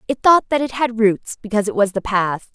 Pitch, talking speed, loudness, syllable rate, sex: 225 Hz, 260 wpm, -18 LUFS, 5.9 syllables/s, female